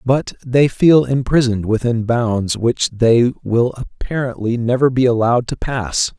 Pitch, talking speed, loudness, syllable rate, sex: 120 Hz, 145 wpm, -16 LUFS, 4.2 syllables/s, male